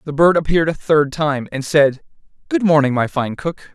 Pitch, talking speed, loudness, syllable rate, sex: 150 Hz, 210 wpm, -17 LUFS, 5.2 syllables/s, male